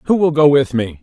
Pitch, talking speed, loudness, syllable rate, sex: 140 Hz, 295 wpm, -14 LUFS, 5.8 syllables/s, male